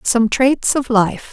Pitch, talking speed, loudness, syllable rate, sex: 240 Hz, 180 wpm, -15 LUFS, 3.5 syllables/s, female